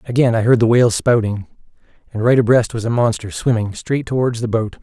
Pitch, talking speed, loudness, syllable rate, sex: 115 Hz, 210 wpm, -16 LUFS, 5.9 syllables/s, male